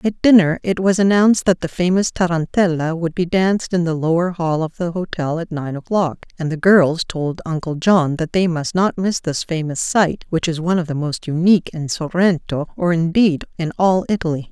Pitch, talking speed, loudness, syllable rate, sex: 170 Hz, 205 wpm, -18 LUFS, 5.1 syllables/s, female